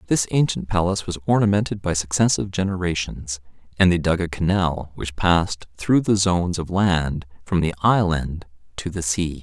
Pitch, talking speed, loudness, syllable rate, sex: 90 Hz, 165 wpm, -21 LUFS, 5.2 syllables/s, male